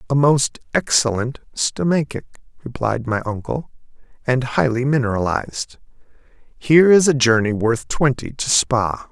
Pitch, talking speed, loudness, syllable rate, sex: 125 Hz, 120 wpm, -18 LUFS, 4.5 syllables/s, male